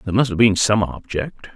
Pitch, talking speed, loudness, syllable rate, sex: 100 Hz, 230 wpm, -18 LUFS, 5.7 syllables/s, male